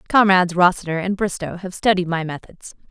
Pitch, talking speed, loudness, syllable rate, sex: 180 Hz, 165 wpm, -19 LUFS, 5.9 syllables/s, female